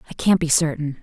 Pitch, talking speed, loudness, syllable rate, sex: 155 Hz, 235 wpm, -19 LUFS, 6.3 syllables/s, female